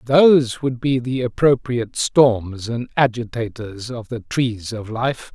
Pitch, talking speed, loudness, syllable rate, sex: 120 Hz, 145 wpm, -19 LUFS, 3.8 syllables/s, male